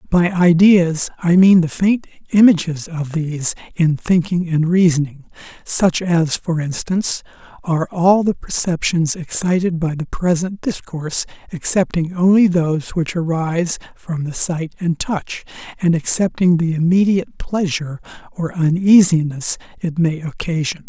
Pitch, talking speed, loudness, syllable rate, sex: 170 Hz, 130 wpm, -17 LUFS, 4.5 syllables/s, male